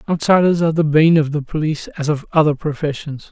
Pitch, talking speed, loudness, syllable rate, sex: 155 Hz, 200 wpm, -17 LUFS, 6.3 syllables/s, male